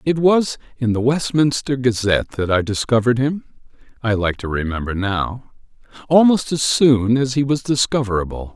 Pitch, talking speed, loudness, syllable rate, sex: 125 Hz, 155 wpm, -18 LUFS, 4.5 syllables/s, male